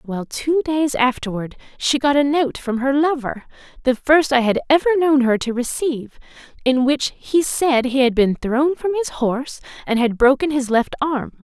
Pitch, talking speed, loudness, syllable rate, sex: 270 Hz, 185 wpm, -18 LUFS, 4.7 syllables/s, female